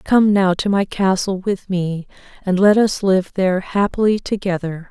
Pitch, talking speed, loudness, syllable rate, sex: 190 Hz, 170 wpm, -17 LUFS, 4.5 syllables/s, female